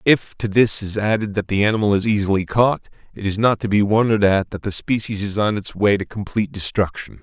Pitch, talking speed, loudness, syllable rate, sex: 105 Hz, 235 wpm, -19 LUFS, 5.8 syllables/s, male